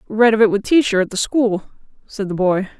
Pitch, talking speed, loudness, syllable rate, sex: 210 Hz, 235 wpm, -17 LUFS, 5.6 syllables/s, female